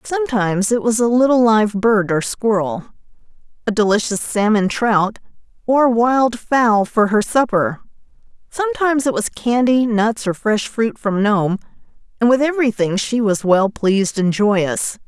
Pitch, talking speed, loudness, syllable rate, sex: 220 Hz, 150 wpm, -17 LUFS, 4.4 syllables/s, female